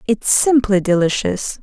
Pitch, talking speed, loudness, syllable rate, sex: 215 Hz, 110 wpm, -15 LUFS, 4.1 syllables/s, female